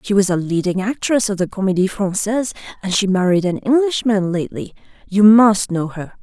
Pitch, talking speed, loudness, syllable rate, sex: 200 Hz, 185 wpm, -17 LUFS, 5.6 syllables/s, female